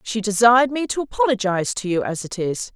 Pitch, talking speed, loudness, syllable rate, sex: 220 Hz, 220 wpm, -20 LUFS, 6.1 syllables/s, female